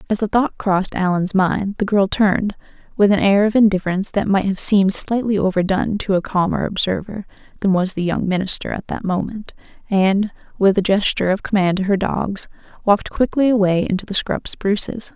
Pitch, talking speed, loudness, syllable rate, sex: 195 Hz, 190 wpm, -18 LUFS, 5.6 syllables/s, female